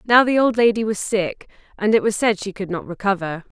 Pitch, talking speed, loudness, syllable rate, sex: 205 Hz, 235 wpm, -20 LUFS, 5.5 syllables/s, female